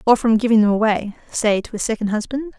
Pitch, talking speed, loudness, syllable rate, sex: 225 Hz, 210 wpm, -19 LUFS, 6.1 syllables/s, female